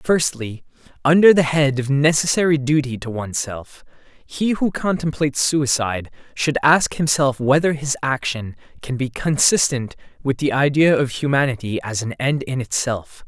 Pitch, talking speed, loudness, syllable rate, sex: 140 Hz, 145 wpm, -19 LUFS, 4.8 syllables/s, male